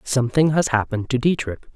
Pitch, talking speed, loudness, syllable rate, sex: 130 Hz, 170 wpm, -20 LUFS, 6.3 syllables/s, female